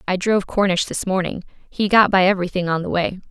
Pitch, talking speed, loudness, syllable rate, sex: 190 Hz, 220 wpm, -19 LUFS, 6.4 syllables/s, female